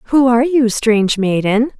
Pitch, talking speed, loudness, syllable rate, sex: 235 Hz, 165 wpm, -14 LUFS, 4.8 syllables/s, female